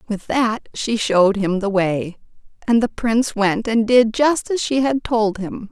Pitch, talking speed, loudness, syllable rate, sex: 220 Hz, 200 wpm, -18 LUFS, 4.2 syllables/s, female